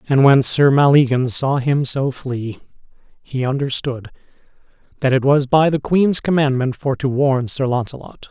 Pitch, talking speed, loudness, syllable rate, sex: 135 Hz, 160 wpm, -17 LUFS, 4.6 syllables/s, male